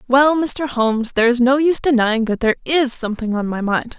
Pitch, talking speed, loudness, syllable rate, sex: 250 Hz, 225 wpm, -17 LUFS, 5.9 syllables/s, female